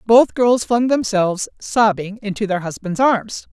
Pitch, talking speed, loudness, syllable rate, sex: 215 Hz, 150 wpm, -18 LUFS, 4.3 syllables/s, female